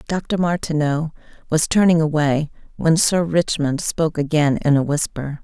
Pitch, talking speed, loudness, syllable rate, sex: 155 Hz, 145 wpm, -19 LUFS, 4.6 syllables/s, female